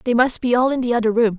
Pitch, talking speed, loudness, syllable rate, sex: 235 Hz, 345 wpm, -18 LUFS, 7.1 syllables/s, female